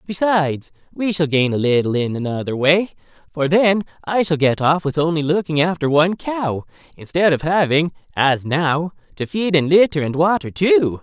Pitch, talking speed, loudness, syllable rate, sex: 160 Hz, 180 wpm, -18 LUFS, 4.9 syllables/s, male